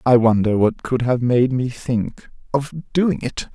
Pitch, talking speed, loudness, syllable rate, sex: 125 Hz, 185 wpm, -19 LUFS, 3.8 syllables/s, male